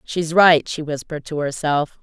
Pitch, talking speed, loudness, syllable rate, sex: 155 Hz, 180 wpm, -19 LUFS, 4.7 syllables/s, female